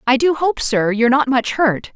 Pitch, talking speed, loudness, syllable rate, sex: 260 Hz, 245 wpm, -16 LUFS, 5.0 syllables/s, female